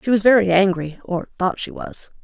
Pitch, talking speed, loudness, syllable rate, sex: 195 Hz, 215 wpm, -19 LUFS, 5.3 syllables/s, female